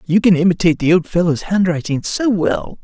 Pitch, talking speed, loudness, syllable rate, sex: 180 Hz, 190 wpm, -16 LUFS, 5.6 syllables/s, male